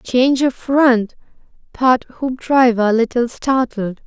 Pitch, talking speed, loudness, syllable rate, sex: 245 Hz, 120 wpm, -16 LUFS, 3.8 syllables/s, female